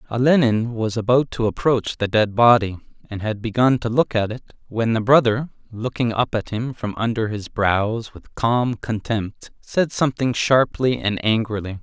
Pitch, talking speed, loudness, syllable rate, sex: 115 Hz, 175 wpm, -20 LUFS, 4.5 syllables/s, male